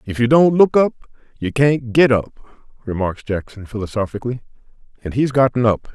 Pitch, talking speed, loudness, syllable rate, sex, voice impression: 120 Hz, 160 wpm, -17 LUFS, 5.6 syllables/s, male, very masculine, slightly old, thick, tensed, slightly weak, bright, soft, clear, slightly fluent, slightly raspy, very cool, intellectual, very sincere, very calm, very mature, very friendly, very reassuring, very unique, elegant, very wild, very sweet, very lively, kind